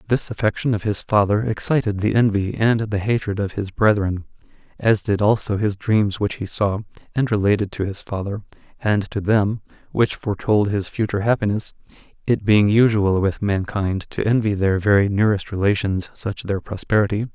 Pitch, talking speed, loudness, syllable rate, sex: 105 Hz, 170 wpm, -20 LUFS, 5.2 syllables/s, male